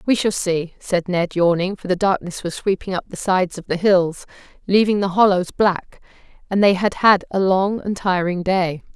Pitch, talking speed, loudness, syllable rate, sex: 185 Hz, 200 wpm, -19 LUFS, 4.9 syllables/s, female